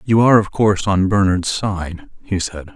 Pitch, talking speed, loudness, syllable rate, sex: 95 Hz, 195 wpm, -17 LUFS, 4.8 syllables/s, male